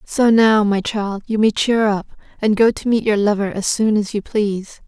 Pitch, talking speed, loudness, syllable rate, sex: 210 Hz, 235 wpm, -17 LUFS, 4.8 syllables/s, female